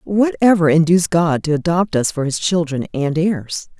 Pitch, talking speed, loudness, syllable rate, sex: 165 Hz, 190 wpm, -16 LUFS, 4.9 syllables/s, female